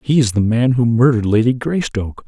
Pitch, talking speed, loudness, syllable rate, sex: 120 Hz, 210 wpm, -16 LUFS, 6.0 syllables/s, male